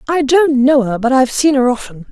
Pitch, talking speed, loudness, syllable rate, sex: 265 Hz, 285 wpm, -13 LUFS, 5.8 syllables/s, female